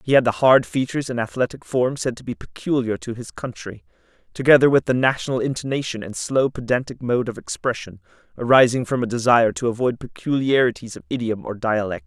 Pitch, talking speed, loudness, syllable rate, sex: 120 Hz, 185 wpm, -21 LUFS, 6.0 syllables/s, male